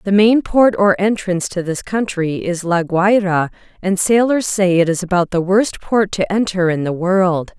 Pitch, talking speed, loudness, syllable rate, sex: 190 Hz, 200 wpm, -16 LUFS, 4.5 syllables/s, female